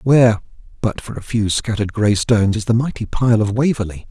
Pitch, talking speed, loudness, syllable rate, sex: 110 Hz, 205 wpm, -18 LUFS, 5.8 syllables/s, male